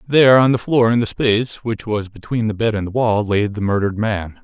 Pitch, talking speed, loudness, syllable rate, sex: 110 Hz, 255 wpm, -17 LUFS, 5.7 syllables/s, male